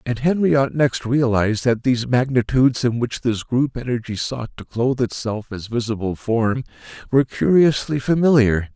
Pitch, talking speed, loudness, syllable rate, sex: 125 Hz, 150 wpm, -19 LUFS, 5.0 syllables/s, male